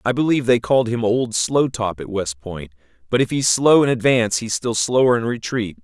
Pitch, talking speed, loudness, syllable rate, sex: 115 Hz, 225 wpm, -18 LUFS, 5.5 syllables/s, male